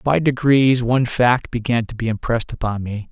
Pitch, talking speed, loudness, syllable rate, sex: 120 Hz, 195 wpm, -19 LUFS, 5.2 syllables/s, male